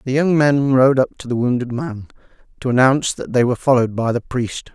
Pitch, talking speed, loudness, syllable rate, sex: 125 Hz, 230 wpm, -17 LUFS, 5.9 syllables/s, male